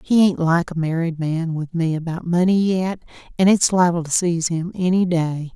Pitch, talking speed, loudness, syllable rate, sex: 170 Hz, 205 wpm, -19 LUFS, 4.9 syllables/s, female